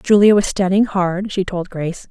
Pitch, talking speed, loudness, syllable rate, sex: 190 Hz, 200 wpm, -17 LUFS, 4.8 syllables/s, female